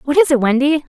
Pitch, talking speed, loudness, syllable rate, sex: 280 Hz, 250 wpm, -15 LUFS, 6.6 syllables/s, female